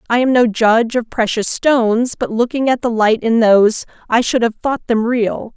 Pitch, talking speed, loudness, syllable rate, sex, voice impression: 235 Hz, 215 wpm, -15 LUFS, 4.9 syllables/s, female, feminine, middle-aged, tensed, powerful, clear, slightly fluent, intellectual, friendly, elegant, lively, slightly kind